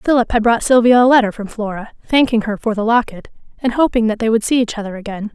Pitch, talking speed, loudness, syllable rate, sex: 225 Hz, 245 wpm, -16 LUFS, 6.3 syllables/s, female